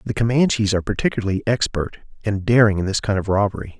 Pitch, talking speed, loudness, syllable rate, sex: 105 Hz, 190 wpm, -20 LUFS, 6.8 syllables/s, male